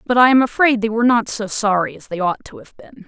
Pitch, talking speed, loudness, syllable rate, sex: 225 Hz, 290 wpm, -16 LUFS, 6.3 syllables/s, female